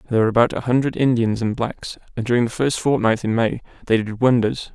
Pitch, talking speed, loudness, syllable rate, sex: 120 Hz, 230 wpm, -20 LUFS, 6.3 syllables/s, male